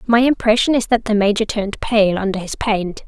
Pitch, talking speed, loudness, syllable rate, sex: 215 Hz, 215 wpm, -17 LUFS, 5.5 syllables/s, female